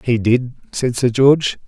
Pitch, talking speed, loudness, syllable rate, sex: 125 Hz, 180 wpm, -16 LUFS, 4.4 syllables/s, male